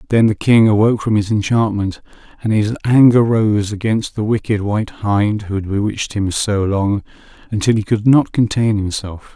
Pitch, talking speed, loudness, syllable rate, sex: 105 Hz, 180 wpm, -16 LUFS, 5.0 syllables/s, male